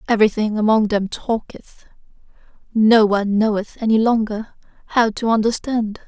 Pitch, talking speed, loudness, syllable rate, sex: 220 Hz, 120 wpm, -18 LUFS, 5.0 syllables/s, female